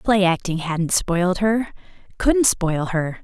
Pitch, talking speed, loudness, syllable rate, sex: 190 Hz, 130 wpm, -20 LUFS, 3.8 syllables/s, female